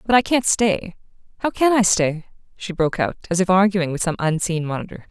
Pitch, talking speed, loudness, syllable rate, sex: 185 Hz, 200 wpm, -20 LUFS, 5.6 syllables/s, female